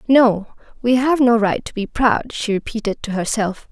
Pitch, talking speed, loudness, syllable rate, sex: 225 Hz, 195 wpm, -18 LUFS, 4.7 syllables/s, female